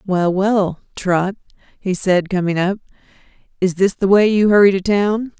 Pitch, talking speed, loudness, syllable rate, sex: 190 Hz, 165 wpm, -16 LUFS, 4.3 syllables/s, female